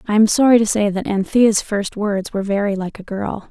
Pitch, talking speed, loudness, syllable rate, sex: 205 Hz, 240 wpm, -17 LUFS, 5.4 syllables/s, female